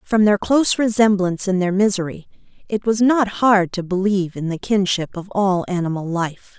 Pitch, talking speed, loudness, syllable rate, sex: 195 Hz, 180 wpm, -19 LUFS, 5.2 syllables/s, female